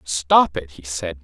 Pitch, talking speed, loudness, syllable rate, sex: 90 Hz, 195 wpm, -19 LUFS, 3.6 syllables/s, male